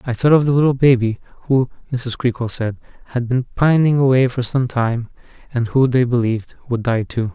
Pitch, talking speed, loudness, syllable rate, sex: 125 Hz, 195 wpm, -18 LUFS, 5.4 syllables/s, male